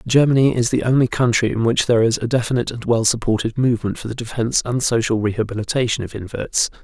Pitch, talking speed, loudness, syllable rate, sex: 115 Hz, 200 wpm, -19 LUFS, 6.7 syllables/s, male